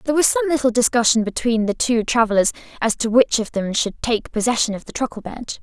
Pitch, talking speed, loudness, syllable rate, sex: 235 Hz, 225 wpm, -19 LUFS, 6.0 syllables/s, female